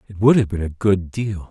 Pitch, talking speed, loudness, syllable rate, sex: 100 Hz, 280 wpm, -19 LUFS, 5.1 syllables/s, male